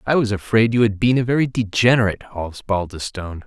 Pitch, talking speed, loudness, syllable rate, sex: 105 Hz, 175 wpm, -19 LUFS, 6.1 syllables/s, male